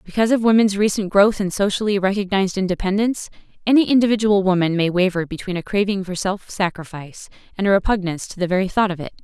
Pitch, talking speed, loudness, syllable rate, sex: 195 Hz, 190 wpm, -19 LUFS, 6.8 syllables/s, female